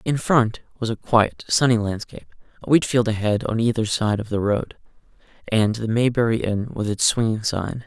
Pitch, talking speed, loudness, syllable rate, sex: 110 Hz, 190 wpm, -21 LUFS, 5.1 syllables/s, male